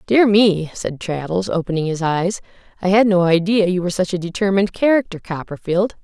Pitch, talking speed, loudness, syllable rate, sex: 185 Hz, 180 wpm, -18 LUFS, 5.5 syllables/s, female